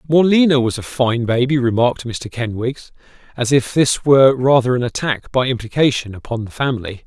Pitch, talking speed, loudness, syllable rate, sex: 125 Hz, 170 wpm, -17 LUFS, 5.4 syllables/s, male